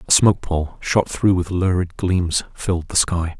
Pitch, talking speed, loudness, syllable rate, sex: 90 Hz, 195 wpm, -19 LUFS, 4.5 syllables/s, male